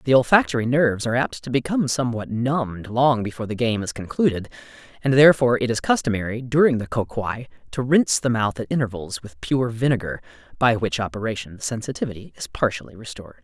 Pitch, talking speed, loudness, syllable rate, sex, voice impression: 120 Hz, 185 wpm, -22 LUFS, 6.4 syllables/s, male, masculine, adult-like, tensed, slightly weak, bright, clear, fluent, cool, intellectual, refreshing, calm, friendly, reassuring, lively, kind